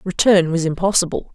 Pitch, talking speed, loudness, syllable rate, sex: 180 Hz, 135 wpm, -17 LUFS, 5.7 syllables/s, female